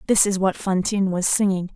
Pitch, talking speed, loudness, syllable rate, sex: 190 Hz, 205 wpm, -20 LUFS, 5.8 syllables/s, female